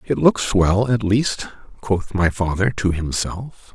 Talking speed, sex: 160 wpm, male